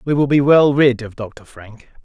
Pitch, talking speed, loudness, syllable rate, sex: 130 Hz, 235 wpm, -14 LUFS, 4.4 syllables/s, male